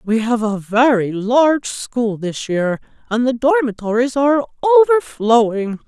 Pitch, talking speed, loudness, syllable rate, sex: 240 Hz, 135 wpm, -16 LUFS, 4.5 syllables/s, female